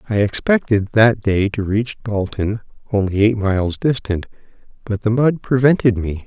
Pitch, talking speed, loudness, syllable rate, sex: 110 Hz, 155 wpm, -18 LUFS, 4.7 syllables/s, male